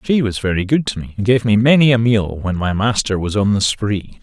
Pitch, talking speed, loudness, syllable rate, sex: 110 Hz, 270 wpm, -16 LUFS, 5.4 syllables/s, male